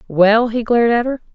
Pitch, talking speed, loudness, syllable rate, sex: 230 Hz, 225 wpm, -15 LUFS, 5.7 syllables/s, female